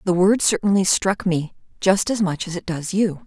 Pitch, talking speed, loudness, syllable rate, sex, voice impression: 185 Hz, 220 wpm, -20 LUFS, 4.9 syllables/s, female, very feminine, slightly young, slightly adult-like, very thin, slightly tensed, weak, bright, hard, clear, fluent, cute, slightly cool, very intellectual, refreshing, very sincere, very calm, friendly, very reassuring, slightly unique, elegant, very sweet, slightly lively, slightly kind